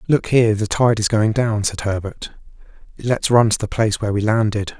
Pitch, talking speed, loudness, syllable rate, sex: 110 Hz, 215 wpm, -18 LUFS, 5.5 syllables/s, male